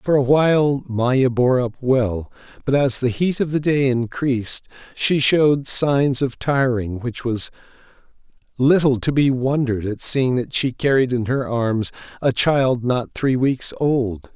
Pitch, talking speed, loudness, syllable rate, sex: 130 Hz, 165 wpm, -19 LUFS, 4.0 syllables/s, male